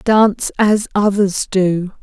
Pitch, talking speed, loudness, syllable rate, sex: 200 Hz, 120 wpm, -15 LUFS, 3.5 syllables/s, female